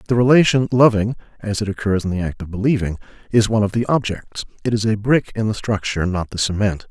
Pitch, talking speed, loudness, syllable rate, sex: 105 Hz, 215 wpm, -19 LUFS, 6.4 syllables/s, male